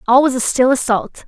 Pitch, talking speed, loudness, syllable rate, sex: 255 Hz, 285 wpm, -15 LUFS, 5.4 syllables/s, female